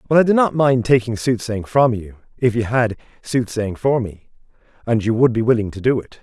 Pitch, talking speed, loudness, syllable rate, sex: 120 Hz, 220 wpm, -18 LUFS, 5.4 syllables/s, male